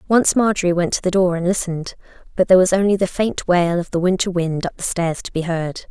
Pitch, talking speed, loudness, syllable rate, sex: 180 Hz, 255 wpm, -18 LUFS, 6.0 syllables/s, female